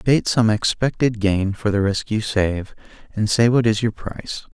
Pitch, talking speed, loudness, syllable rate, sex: 110 Hz, 195 wpm, -20 LUFS, 4.5 syllables/s, male